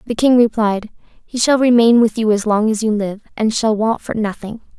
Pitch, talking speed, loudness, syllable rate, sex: 220 Hz, 225 wpm, -16 LUFS, 4.9 syllables/s, female